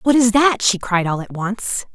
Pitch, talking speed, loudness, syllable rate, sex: 215 Hz, 245 wpm, -17 LUFS, 4.5 syllables/s, female